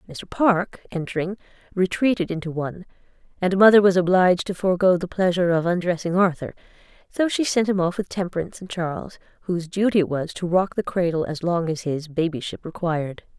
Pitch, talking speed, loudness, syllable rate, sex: 180 Hz, 180 wpm, -22 LUFS, 6.0 syllables/s, female